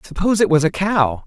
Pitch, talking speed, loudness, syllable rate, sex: 170 Hz, 240 wpm, -17 LUFS, 6.0 syllables/s, male